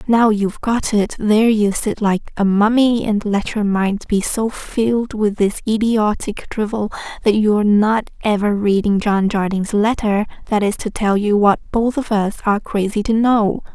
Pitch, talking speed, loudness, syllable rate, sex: 210 Hz, 185 wpm, -17 LUFS, 4.6 syllables/s, female